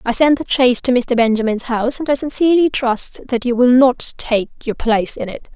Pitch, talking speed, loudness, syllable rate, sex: 250 Hz, 225 wpm, -16 LUFS, 5.6 syllables/s, female